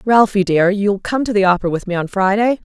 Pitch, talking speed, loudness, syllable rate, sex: 200 Hz, 245 wpm, -16 LUFS, 6.0 syllables/s, female